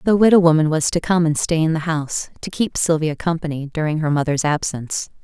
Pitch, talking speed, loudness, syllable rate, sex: 160 Hz, 220 wpm, -19 LUFS, 5.9 syllables/s, female